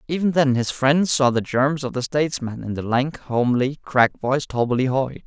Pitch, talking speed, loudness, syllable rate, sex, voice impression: 135 Hz, 195 wpm, -21 LUFS, 5.1 syllables/s, male, masculine, adult-like, slightly tensed, powerful, slightly bright, clear, slightly halting, intellectual, slightly refreshing, calm, friendly, reassuring, slightly wild, slightly lively, kind, slightly modest